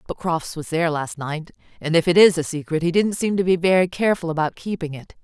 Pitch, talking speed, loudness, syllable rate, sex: 170 Hz, 250 wpm, -20 LUFS, 6.1 syllables/s, female